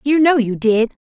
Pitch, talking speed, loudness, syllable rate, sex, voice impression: 250 Hz, 230 wpm, -15 LUFS, 4.7 syllables/s, female, feminine, middle-aged, tensed, powerful, bright, clear, fluent, intellectual, friendly, elegant, lively